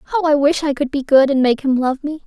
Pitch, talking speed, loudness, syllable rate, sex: 280 Hz, 320 wpm, -16 LUFS, 5.5 syllables/s, female